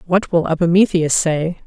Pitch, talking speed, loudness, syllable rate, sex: 170 Hz, 145 wpm, -16 LUFS, 4.7 syllables/s, female